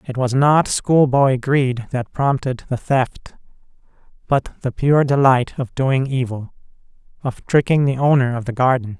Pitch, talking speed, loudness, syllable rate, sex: 130 Hz, 155 wpm, -18 LUFS, 4.2 syllables/s, male